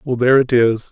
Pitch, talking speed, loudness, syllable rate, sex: 125 Hz, 265 wpm, -14 LUFS, 6.2 syllables/s, male